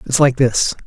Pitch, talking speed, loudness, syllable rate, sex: 125 Hz, 210 wpm, -15 LUFS, 4.6 syllables/s, male